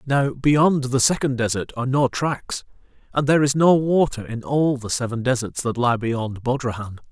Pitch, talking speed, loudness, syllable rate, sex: 130 Hz, 185 wpm, -21 LUFS, 4.9 syllables/s, male